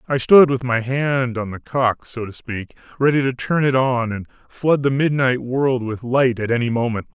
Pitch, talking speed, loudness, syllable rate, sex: 125 Hz, 215 wpm, -19 LUFS, 4.7 syllables/s, male